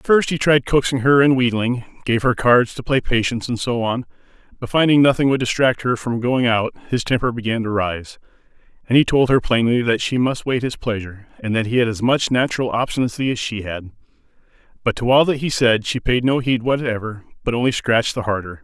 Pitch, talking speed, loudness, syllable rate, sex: 120 Hz, 220 wpm, -18 LUFS, 5.7 syllables/s, male